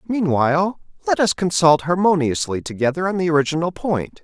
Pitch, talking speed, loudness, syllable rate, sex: 170 Hz, 140 wpm, -19 LUFS, 5.5 syllables/s, male